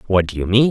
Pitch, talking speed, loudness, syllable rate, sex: 105 Hz, 340 wpm, -18 LUFS, 6.7 syllables/s, male